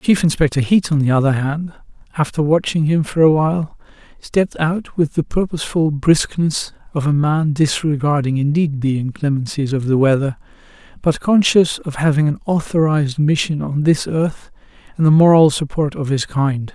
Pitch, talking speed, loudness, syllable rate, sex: 150 Hz, 165 wpm, -17 LUFS, 5.0 syllables/s, male